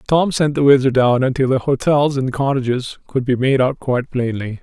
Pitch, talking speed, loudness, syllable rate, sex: 130 Hz, 205 wpm, -17 LUFS, 5.2 syllables/s, male